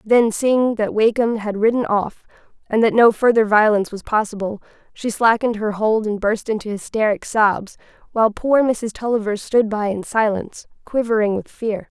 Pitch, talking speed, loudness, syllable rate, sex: 220 Hz, 170 wpm, -19 LUFS, 5.0 syllables/s, female